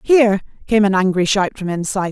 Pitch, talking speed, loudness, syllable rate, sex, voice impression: 200 Hz, 200 wpm, -17 LUFS, 6.4 syllables/s, female, feminine, middle-aged, tensed, slightly powerful, slightly hard, slightly muffled, intellectual, calm, friendly, elegant, slightly sharp